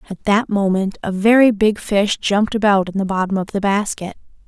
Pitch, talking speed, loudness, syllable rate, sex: 200 Hz, 200 wpm, -17 LUFS, 5.3 syllables/s, female